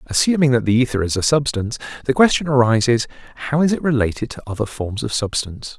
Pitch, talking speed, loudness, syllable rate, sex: 125 Hz, 195 wpm, -18 LUFS, 6.5 syllables/s, male